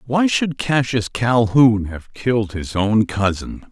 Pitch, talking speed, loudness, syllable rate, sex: 115 Hz, 145 wpm, -18 LUFS, 3.7 syllables/s, male